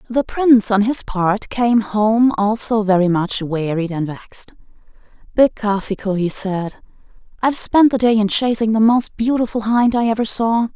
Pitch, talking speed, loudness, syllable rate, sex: 220 Hz, 165 wpm, -17 LUFS, 4.7 syllables/s, female